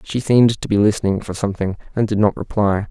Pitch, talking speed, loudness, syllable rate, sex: 105 Hz, 225 wpm, -18 LUFS, 6.5 syllables/s, male